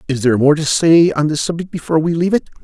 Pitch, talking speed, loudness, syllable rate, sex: 155 Hz, 275 wpm, -15 LUFS, 7.3 syllables/s, male